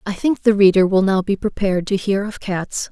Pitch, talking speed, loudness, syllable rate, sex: 195 Hz, 245 wpm, -18 LUFS, 5.4 syllables/s, female